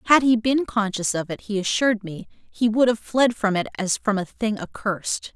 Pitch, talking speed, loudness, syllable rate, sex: 215 Hz, 225 wpm, -22 LUFS, 5.0 syllables/s, female